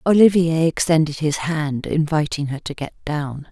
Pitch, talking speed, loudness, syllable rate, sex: 155 Hz, 155 wpm, -20 LUFS, 4.6 syllables/s, female